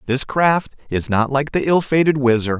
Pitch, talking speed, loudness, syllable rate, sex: 140 Hz, 210 wpm, -18 LUFS, 4.7 syllables/s, male